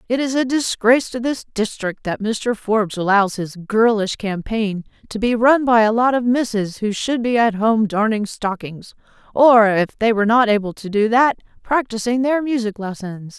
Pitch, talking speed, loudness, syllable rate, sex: 225 Hz, 190 wpm, -18 LUFS, 4.7 syllables/s, female